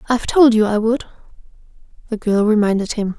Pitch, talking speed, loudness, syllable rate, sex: 220 Hz, 170 wpm, -16 LUFS, 6.1 syllables/s, female